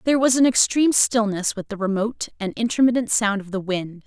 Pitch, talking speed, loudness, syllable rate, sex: 220 Hz, 205 wpm, -20 LUFS, 6.0 syllables/s, female